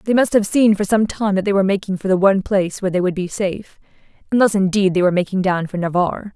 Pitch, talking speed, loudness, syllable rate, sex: 195 Hz, 265 wpm, -17 LUFS, 7.0 syllables/s, female